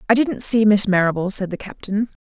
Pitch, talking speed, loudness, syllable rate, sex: 205 Hz, 215 wpm, -18 LUFS, 5.7 syllables/s, female